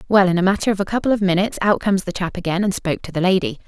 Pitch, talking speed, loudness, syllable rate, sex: 190 Hz, 310 wpm, -19 LUFS, 7.9 syllables/s, female